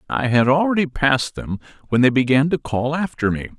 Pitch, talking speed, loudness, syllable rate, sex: 140 Hz, 200 wpm, -19 LUFS, 5.6 syllables/s, male